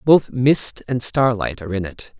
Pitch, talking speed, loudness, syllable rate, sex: 120 Hz, 190 wpm, -19 LUFS, 4.4 syllables/s, male